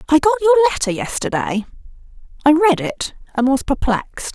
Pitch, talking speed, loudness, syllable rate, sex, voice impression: 280 Hz, 150 wpm, -17 LUFS, 6.0 syllables/s, female, feminine, adult-like, slightly muffled, fluent, slightly intellectual, slightly intense